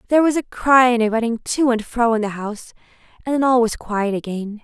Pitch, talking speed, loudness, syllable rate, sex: 235 Hz, 245 wpm, -18 LUFS, 5.9 syllables/s, female